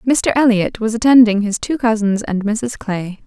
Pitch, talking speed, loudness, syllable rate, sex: 220 Hz, 185 wpm, -16 LUFS, 4.6 syllables/s, female